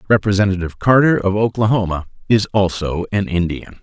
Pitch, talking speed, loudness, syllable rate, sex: 100 Hz, 125 wpm, -17 LUFS, 5.6 syllables/s, male